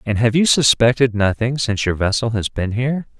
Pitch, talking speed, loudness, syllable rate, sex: 120 Hz, 205 wpm, -17 LUFS, 5.7 syllables/s, male